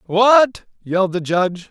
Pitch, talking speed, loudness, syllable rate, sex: 200 Hz, 140 wpm, -16 LUFS, 4.4 syllables/s, male